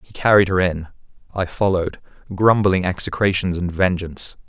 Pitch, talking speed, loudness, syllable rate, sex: 95 Hz, 135 wpm, -19 LUFS, 5.4 syllables/s, male